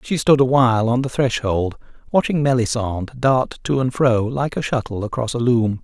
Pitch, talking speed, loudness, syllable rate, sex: 125 Hz, 185 wpm, -19 LUFS, 5.1 syllables/s, male